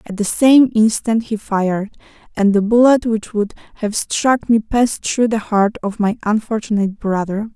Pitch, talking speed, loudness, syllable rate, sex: 215 Hz, 175 wpm, -16 LUFS, 4.7 syllables/s, female